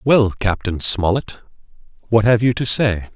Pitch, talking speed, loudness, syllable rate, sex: 110 Hz, 150 wpm, -17 LUFS, 4.4 syllables/s, male